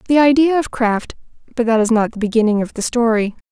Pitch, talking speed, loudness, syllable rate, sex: 235 Hz, 205 wpm, -16 LUFS, 6.1 syllables/s, female